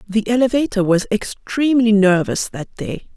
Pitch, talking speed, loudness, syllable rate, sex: 210 Hz, 135 wpm, -17 LUFS, 5.1 syllables/s, female